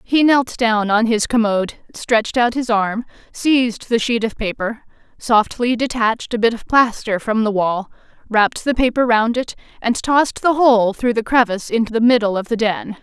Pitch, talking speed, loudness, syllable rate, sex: 230 Hz, 195 wpm, -17 LUFS, 5.1 syllables/s, female